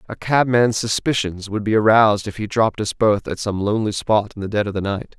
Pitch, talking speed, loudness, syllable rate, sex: 105 Hz, 245 wpm, -19 LUFS, 5.8 syllables/s, male